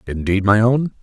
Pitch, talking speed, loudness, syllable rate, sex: 110 Hz, 175 wpm, -16 LUFS, 4.8 syllables/s, male